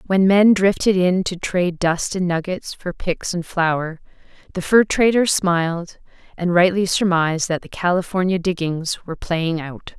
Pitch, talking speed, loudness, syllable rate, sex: 180 Hz, 160 wpm, -19 LUFS, 4.5 syllables/s, female